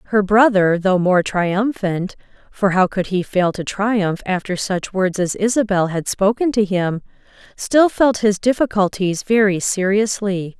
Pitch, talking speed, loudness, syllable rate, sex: 200 Hz, 140 wpm, -18 LUFS, 4.2 syllables/s, female